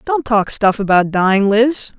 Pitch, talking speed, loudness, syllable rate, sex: 215 Hz, 180 wpm, -14 LUFS, 4.3 syllables/s, female